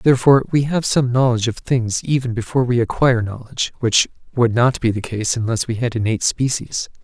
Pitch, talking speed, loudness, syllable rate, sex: 120 Hz, 195 wpm, -18 LUFS, 6.0 syllables/s, male